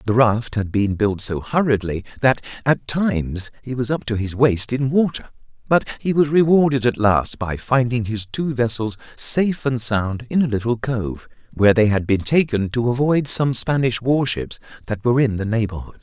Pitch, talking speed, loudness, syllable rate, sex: 120 Hz, 190 wpm, -20 LUFS, 4.9 syllables/s, male